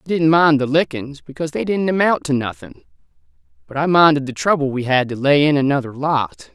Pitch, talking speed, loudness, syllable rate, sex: 150 Hz, 210 wpm, -17 LUFS, 5.7 syllables/s, male